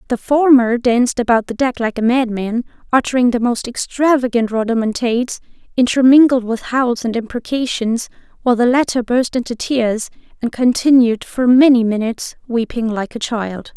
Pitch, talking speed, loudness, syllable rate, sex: 240 Hz, 150 wpm, -16 LUFS, 5.1 syllables/s, female